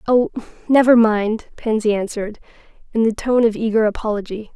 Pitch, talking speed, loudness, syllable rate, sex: 220 Hz, 145 wpm, -18 LUFS, 5.5 syllables/s, female